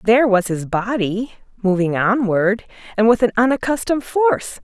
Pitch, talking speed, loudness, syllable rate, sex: 220 Hz, 140 wpm, -18 LUFS, 5.2 syllables/s, female